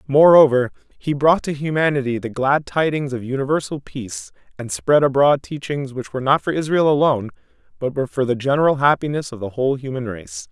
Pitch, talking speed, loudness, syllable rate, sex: 135 Hz, 185 wpm, -19 LUFS, 5.9 syllables/s, male